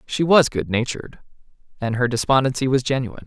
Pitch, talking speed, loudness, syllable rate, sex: 125 Hz, 145 wpm, -20 LUFS, 6.3 syllables/s, male